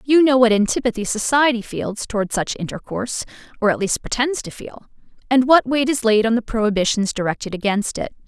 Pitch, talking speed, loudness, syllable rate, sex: 230 Hz, 190 wpm, -19 LUFS, 5.8 syllables/s, female